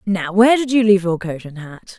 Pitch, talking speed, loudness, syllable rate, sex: 195 Hz, 270 wpm, -15 LUFS, 5.8 syllables/s, female